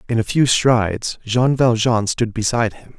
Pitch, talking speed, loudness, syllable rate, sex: 115 Hz, 180 wpm, -18 LUFS, 4.7 syllables/s, male